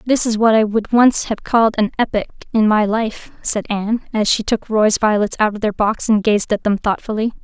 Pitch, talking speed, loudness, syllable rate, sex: 215 Hz, 235 wpm, -17 LUFS, 5.3 syllables/s, female